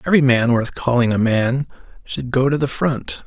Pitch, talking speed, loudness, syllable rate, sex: 125 Hz, 200 wpm, -18 LUFS, 5.0 syllables/s, male